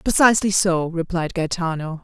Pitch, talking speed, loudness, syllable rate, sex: 175 Hz, 120 wpm, -20 LUFS, 5.0 syllables/s, female